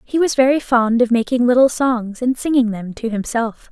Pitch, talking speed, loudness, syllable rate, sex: 240 Hz, 210 wpm, -17 LUFS, 5.0 syllables/s, female